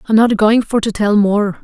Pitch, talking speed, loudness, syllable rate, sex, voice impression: 215 Hz, 255 wpm, -13 LUFS, 4.9 syllables/s, female, feminine, slightly young, slightly tensed, slightly soft, slightly calm, slightly friendly